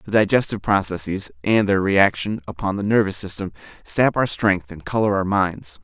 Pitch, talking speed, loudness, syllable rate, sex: 95 Hz, 175 wpm, -20 LUFS, 5.1 syllables/s, male